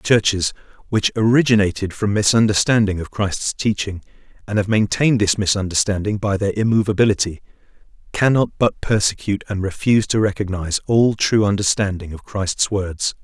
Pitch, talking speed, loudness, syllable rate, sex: 105 Hz, 135 wpm, -18 LUFS, 5.5 syllables/s, male